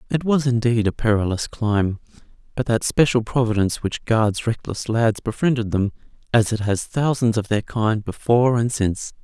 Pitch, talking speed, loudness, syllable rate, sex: 115 Hz, 170 wpm, -21 LUFS, 5.0 syllables/s, male